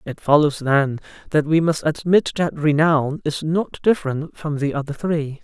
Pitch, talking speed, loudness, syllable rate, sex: 150 Hz, 175 wpm, -20 LUFS, 4.6 syllables/s, male